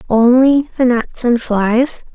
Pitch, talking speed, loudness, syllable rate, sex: 245 Hz, 140 wpm, -14 LUFS, 3.3 syllables/s, female